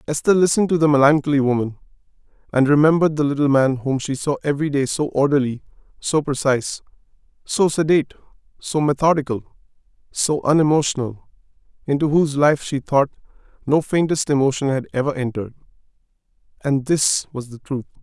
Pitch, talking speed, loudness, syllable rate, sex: 145 Hz, 135 wpm, -19 LUFS, 6.0 syllables/s, male